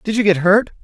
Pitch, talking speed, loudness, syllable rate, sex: 200 Hz, 285 wpm, -15 LUFS, 6.3 syllables/s, male